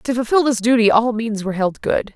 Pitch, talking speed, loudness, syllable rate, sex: 230 Hz, 250 wpm, -17 LUFS, 5.7 syllables/s, female